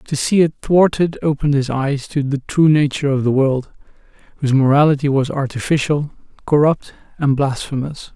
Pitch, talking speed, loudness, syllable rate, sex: 145 Hz, 155 wpm, -17 LUFS, 5.4 syllables/s, male